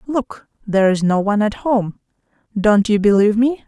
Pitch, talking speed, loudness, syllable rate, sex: 215 Hz, 180 wpm, -16 LUFS, 5.3 syllables/s, female